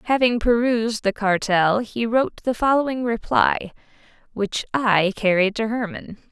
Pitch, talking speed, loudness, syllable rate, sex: 220 Hz, 135 wpm, -21 LUFS, 4.6 syllables/s, female